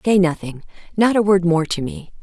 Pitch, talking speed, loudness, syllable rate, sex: 180 Hz, 190 wpm, -18 LUFS, 5.2 syllables/s, female